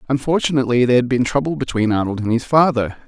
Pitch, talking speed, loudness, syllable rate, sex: 125 Hz, 195 wpm, -17 LUFS, 7.1 syllables/s, male